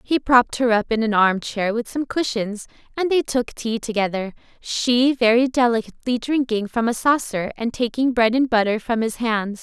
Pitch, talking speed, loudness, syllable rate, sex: 235 Hz, 185 wpm, -20 LUFS, 5.0 syllables/s, female